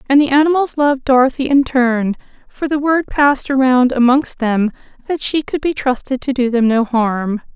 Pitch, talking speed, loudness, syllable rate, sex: 260 Hz, 190 wpm, -15 LUFS, 5.1 syllables/s, female